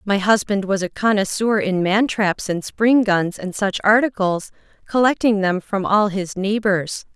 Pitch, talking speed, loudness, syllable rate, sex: 200 Hz, 170 wpm, -19 LUFS, 4.2 syllables/s, female